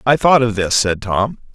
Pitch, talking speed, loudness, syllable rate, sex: 115 Hz, 235 wpm, -16 LUFS, 4.6 syllables/s, male